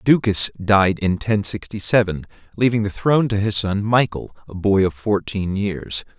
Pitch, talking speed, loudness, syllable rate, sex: 100 Hz, 175 wpm, -19 LUFS, 4.6 syllables/s, male